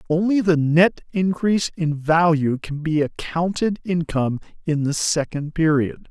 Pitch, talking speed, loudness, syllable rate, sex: 165 Hz, 140 wpm, -20 LUFS, 4.4 syllables/s, male